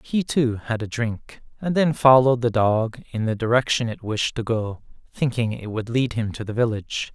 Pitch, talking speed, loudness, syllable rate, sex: 120 Hz, 210 wpm, -22 LUFS, 4.9 syllables/s, male